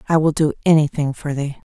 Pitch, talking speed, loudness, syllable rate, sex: 150 Hz, 210 wpm, -18 LUFS, 6.0 syllables/s, female